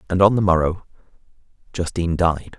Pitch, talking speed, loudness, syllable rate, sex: 90 Hz, 140 wpm, -19 LUFS, 5.8 syllables/s, male